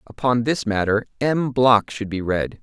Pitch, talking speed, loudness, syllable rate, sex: 115 Hz, 185 wpm, -20 LUFS, 4.3 syllables/s, male